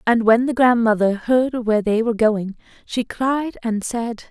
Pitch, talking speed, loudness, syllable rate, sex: 230 Hz, 180 wpm, -19 LUFS, 4.5 syllables/s, female